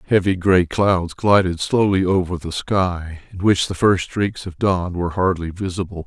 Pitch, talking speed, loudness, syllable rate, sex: 90 Hz, 180 wpm, -19 LUFS, 4.6 syllables/s, male